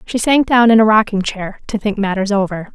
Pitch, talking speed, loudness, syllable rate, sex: 210 Hz, 240 wpm, -14 LUFS, 5.5 syllables/s, female